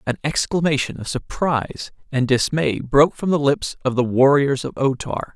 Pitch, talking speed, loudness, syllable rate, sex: 140 Hz, 180 wpm, -20 LUFS, 5.0 syllables/s, male